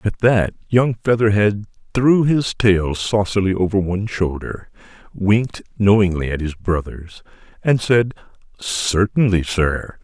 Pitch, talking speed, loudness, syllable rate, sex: 100 Hz, 120 wpm, -18 LUFS, 4.0 syllables/s, male